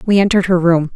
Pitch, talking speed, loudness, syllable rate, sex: 180 Hz, 250 wpm, -13 LUFS, 7.2 syllables/s, female